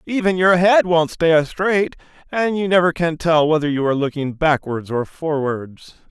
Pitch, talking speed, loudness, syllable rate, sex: 165 Hz, 175 wpm, -18 LUFS, 4.6 syllables/s, male